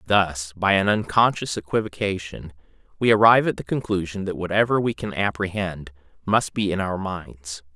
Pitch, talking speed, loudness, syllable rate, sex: 95 Hz, 155 wpm, -22 LUFS, 5.1 syllables/s, male